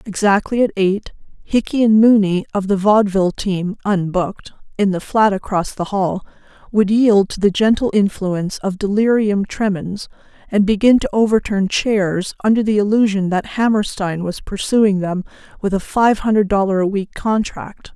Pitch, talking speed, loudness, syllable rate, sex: 200 Hz, 155 wpm, -17 LUFS, 4.9 syllables/s, female